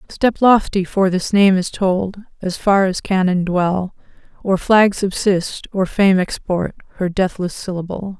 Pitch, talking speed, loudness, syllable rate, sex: 190 Hz, 155 wpm, -17 LUFS, 3.9 syllables/s, female